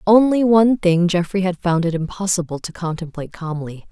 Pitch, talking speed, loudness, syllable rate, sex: 180 Hz, 170 wpm, -18 LUFS, 5.6 syllables/s, female